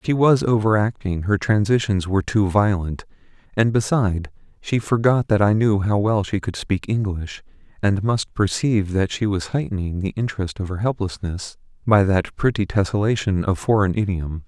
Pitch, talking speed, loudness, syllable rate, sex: 100 Hz, 170 wpm, -21 LUFS, 5.0 syllables/s, male